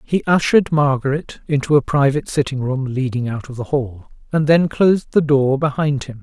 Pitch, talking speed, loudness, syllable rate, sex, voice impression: 140 Hz, 195 wpm, -18 LUFS, 5.3 syllables/s, male, masculine, adult-like, tensed, powerful, slightly soft, slightly raspy, intellectual, friendly, lively, slightly sharp